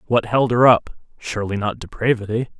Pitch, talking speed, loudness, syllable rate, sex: 115 Hz, 140 wpm, -19 LUFS, 5.7 syllables/s, male